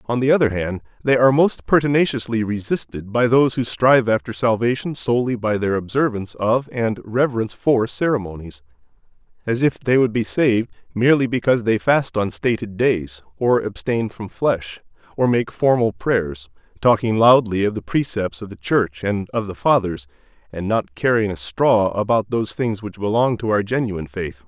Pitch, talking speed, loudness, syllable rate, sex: 110 Hz, 175 wpm, -19 LUFS, 5.2 syllables/s, male